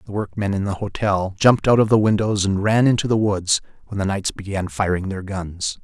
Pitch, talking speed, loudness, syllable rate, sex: 100 Hz, 225 wpm, -20 LUFS, 5.4 syllables/s, male